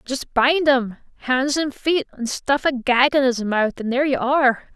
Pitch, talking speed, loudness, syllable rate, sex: 260 Hz, 215 wpm, -19 LUFS, 4.7 syllables/s, female